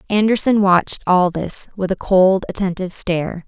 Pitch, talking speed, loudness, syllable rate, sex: 185 Hz, 155 wpm, -17 LUFS, 5.1 syllables/s, female